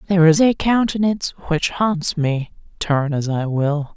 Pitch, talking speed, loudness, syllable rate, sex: 170 Hz, 165 wpm, -18 LUFS, 4.5 syllables/s, female